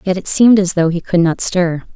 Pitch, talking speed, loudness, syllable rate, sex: 180 Hz, 275 wpm, -14 LUFS, 5.6 syllables/s, female